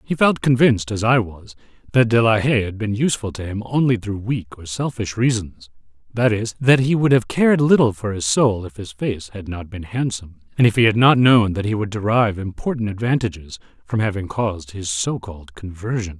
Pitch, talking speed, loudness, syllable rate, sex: 110 Hz, 210 wpm, -19 LUFS, 5.5 syllables/s, male